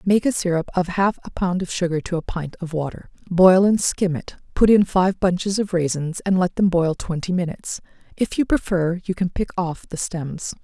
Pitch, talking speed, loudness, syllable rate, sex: 180 Hz, 220 wpm, -21 LUFS, 5.0 syllables/s, female